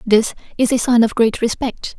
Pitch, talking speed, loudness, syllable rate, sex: 235 Hz, 210 wpm, -17 LUFS, 4.9 syllables/s, female